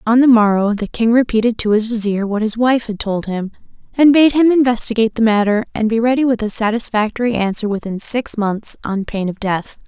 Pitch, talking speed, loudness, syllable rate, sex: 225 Hz, 215 wpm, -16 LUFS, 5.6 syllables/s, female